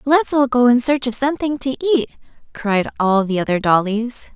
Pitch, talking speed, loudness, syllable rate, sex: 245 Hz, 195 wpm, -17 LUFS, 5.1 syllables/s, female